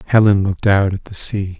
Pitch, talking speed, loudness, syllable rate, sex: 100 Hz, 225 wpm, -16 LUFS, 5.7 syllables/s, male